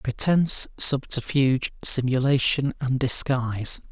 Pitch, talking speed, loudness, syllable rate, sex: 130 Hz, 75 wpm, -21 LUFS, 4.2 syllables/s, male